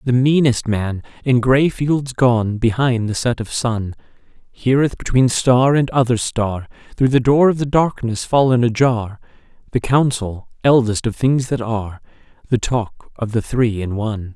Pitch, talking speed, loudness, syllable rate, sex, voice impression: 120 Hz, 165 wpm, -17 LUFS, 4.4 syllables/s, male, masculine, middle-aged, thick, tensed, powerful, slightly soft, clear, cool, intellectual, calm, mature, wild, lively